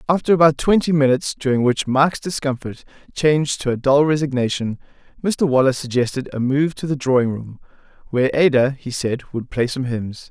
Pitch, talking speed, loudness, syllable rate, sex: 135 Hz, 175 wpm, -19 LUFS, 5.6 syllables/s, male